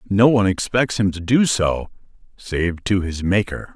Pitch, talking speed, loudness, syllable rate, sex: 100 Hz, 160 wpm, -19 LUFS, 4.6 syllables/s, male